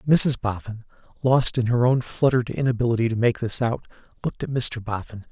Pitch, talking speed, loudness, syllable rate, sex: 120 Hz, 180 wpm, -22 LUFS, 5.8 syllables/s, male